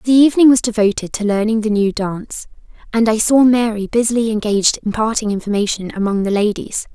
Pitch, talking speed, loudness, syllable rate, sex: 220 Hz, 175 wpm, -16 LUFS, 6.0 syllables/s, female